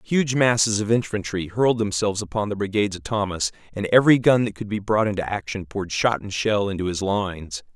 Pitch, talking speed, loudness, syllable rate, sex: 105 Hz, 210 wpm, -22 LUFS, 6.0 syllables/s, male